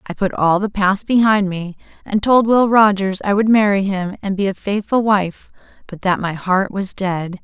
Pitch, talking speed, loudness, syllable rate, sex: 200 Hz, 210 wpm, -17 LUFS, 4.5 syllables/s, female